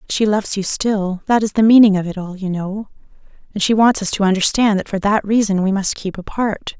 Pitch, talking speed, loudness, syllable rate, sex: 205 Hz, 220 wpm, -16 LUFS, 5.6 syllables/s, female